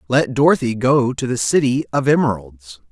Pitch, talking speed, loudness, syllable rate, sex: 120 Hz, 165 wpm, -17 LUFS, 4.9 syllables/s, male